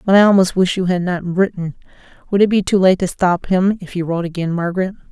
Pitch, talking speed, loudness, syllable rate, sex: 185 Hz, 245 wpm, -16 LUFS, 6.3 syllables/s, female